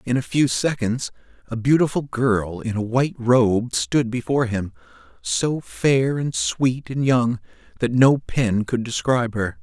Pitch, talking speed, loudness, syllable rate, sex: 120 Hz, 160 wpm, -21 LUFS, 4.1 syllables/s, male